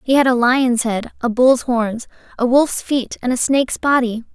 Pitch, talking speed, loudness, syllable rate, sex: 245 Hz, 205 wpm, -17 LUFS, 4.6 syllables/s, female